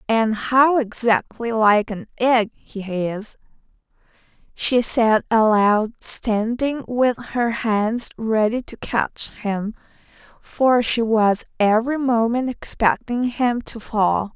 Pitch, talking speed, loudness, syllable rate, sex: 225 Hz, 115 wpm, -20 LUFS, 3.2 syllables/s, female